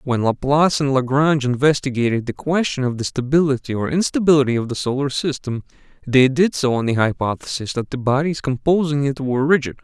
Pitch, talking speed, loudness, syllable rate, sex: 135 Hz, 175 wpm, -19 LUFS, 6.0 syllables/s, male